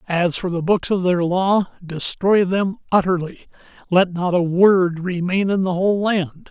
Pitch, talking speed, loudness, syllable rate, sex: 185 Hz, 175 wpm, -19 LUFS, 4.3 syllables/s, male